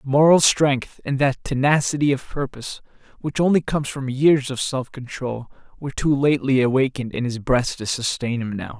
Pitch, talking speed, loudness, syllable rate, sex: 135 Hz, 175 wpm, -21 LUFS, 5.3 syllables/s, male